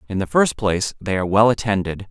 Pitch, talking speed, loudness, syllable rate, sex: 105 Hz, 230 wpm, -19 LUFS, 6.4 syllables/s, male